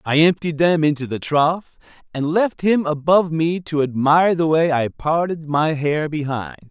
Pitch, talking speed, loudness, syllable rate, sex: 155 Hz, 180 wpm, -19 LUFS, 4.7 syllables/s, male